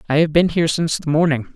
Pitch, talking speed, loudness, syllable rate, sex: 155 Hz, 270 wpm, -17 LUFS, 7.9 syllables/s, male